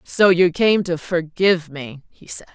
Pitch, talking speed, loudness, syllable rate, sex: 175 Hz, 190 wpm, -18 LUFS, 4.3 syllables/s, female